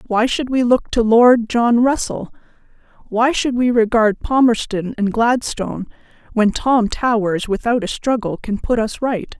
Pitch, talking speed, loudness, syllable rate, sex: 230 Hz, 155 wpm, -17 LUFS, 4.3 syllables/s, female